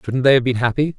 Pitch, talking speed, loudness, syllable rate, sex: 130 Hz, 305 wpm, -17 LUFS, 6.7 syllables/s, male